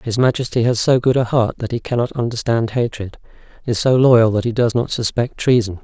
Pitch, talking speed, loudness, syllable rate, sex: 115 Hz, 215 wpm, -17 LUFS, 5.5 syllables/s, male